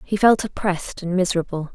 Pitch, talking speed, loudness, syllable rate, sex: 185 Hz, 170 wpm, -21 LUFS, 6.1 syllables/s, female